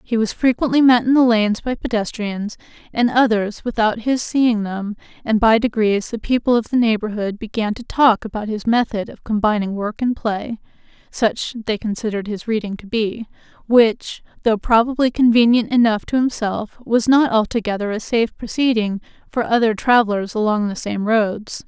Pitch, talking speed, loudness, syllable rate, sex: 225 Hz, 170 wpm, -18 LUFS, 4.6 syllables/s, female